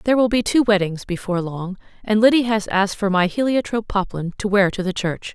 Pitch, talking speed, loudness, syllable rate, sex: 205 Hz, 225 wpm, -19 LUFS, 6.0 syllables/s, female